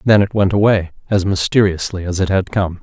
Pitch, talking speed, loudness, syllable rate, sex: 95 Hz, 215 wpm, -16 LUFS, 5.5 syllables/s, male